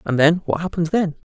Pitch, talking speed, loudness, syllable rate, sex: 170 Hz, 230 wpm, -19 LUFS, 5.6 syllables/s, male